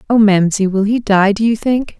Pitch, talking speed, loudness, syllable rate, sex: 210 Hz, 240 wpm, -14 LUFS, 5.1 syllables/s, female